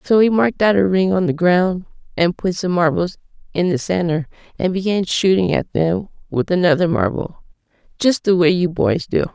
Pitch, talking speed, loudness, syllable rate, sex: 180 Hz, 185 wpm, -18 LUFS, 5.2 syllables/s, female